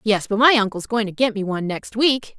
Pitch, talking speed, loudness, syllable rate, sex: 220 Hz, 300 wpm, -19 LUFS, 6.2 syllables/s, female